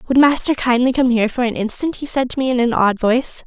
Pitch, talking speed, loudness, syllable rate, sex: 245 Hz, 275 wpm, -17 LUFS, 6.4 syllables/s, female